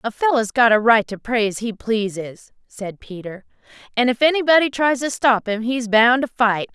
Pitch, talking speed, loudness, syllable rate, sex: 230 Hz, 205 wpm, -18 LUFS, 4.9 syllables/s, female